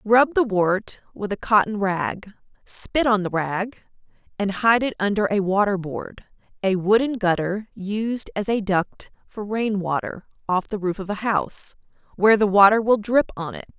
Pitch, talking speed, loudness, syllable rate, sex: 205 Hz, 180 wpm, -22 LUFS, 4.0 syllables/s, female